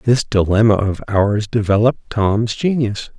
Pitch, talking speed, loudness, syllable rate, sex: 110 Hz, 130 wpm, -16 LUFS, 4.5 syllables/s, male